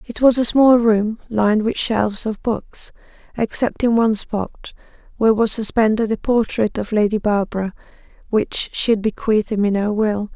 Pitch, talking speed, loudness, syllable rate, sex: 215 Hz, 175 wpm, -18 LUFS, 5.0 syllables/s, female